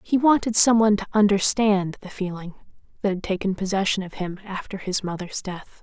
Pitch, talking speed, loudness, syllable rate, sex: 195 Hz, 175 wpm, -22 LUFS, 5.5 syllables/s, female